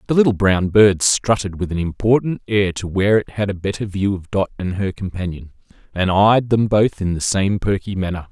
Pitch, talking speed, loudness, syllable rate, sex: 100 Hz, 215 wpm, -18 LUFS, 5.3 syllables/s, male